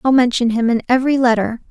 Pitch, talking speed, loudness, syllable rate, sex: 240 Hz, 210 wpm, -16 LUFS, 6.7 syllables/s, female